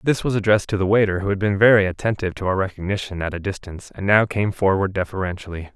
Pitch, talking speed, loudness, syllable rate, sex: 95 Hz, 230 wpm, -20 LUFS, 6.9 syllables/s, male